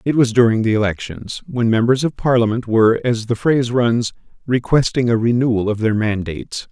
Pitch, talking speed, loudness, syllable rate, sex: 120 Hz, 180 wpm, -17 LUFS, 5.4 syllables/s, male